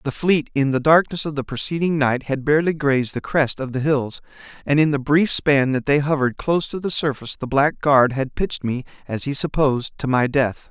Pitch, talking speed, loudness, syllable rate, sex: 140 Hz, 230 wpm, -20 LUFS, 5.6 syllables/s, male